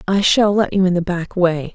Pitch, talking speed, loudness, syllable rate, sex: 185 Hz, 275 wpm, -16 LUFS, 5.0 syllables/s, female